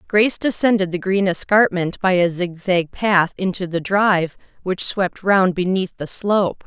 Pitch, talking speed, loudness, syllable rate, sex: 185 Hz, 160 wpm, -19 LUFS, 4.6 syllables/s, female